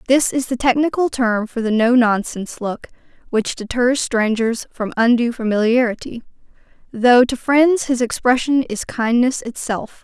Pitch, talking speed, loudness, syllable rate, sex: 240 Hz, 145 wpm, -17 LUFS, 4.5 syllables/s, female